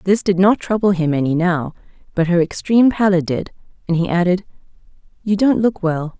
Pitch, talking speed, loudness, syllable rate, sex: 185 Hz, 185 wpm, -17 LUFS, 5.5 syllables/s, female